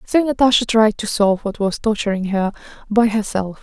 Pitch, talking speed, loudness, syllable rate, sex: 215 Hz, 180 wpm, -18 LUFS, 5.4 syllables/s, female